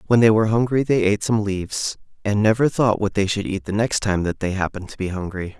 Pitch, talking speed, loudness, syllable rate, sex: 105 Hz, 255 wpm, -21 LUFS, 6.2 syllables/s, male